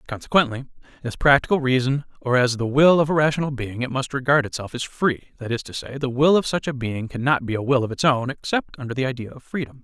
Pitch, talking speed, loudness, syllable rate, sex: 135 Hz, 250 wpm, -21 LUFS, 6.2 syllables/s, male